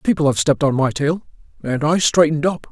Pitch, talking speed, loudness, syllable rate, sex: 155 Hz, 220 wpm, -18 LUFS, 6.1 syllables/s, male